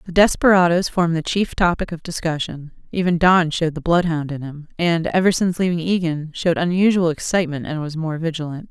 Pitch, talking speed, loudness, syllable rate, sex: 170 Hz, 185 wpm, -19 LUFS, 5.9 syllables/s, female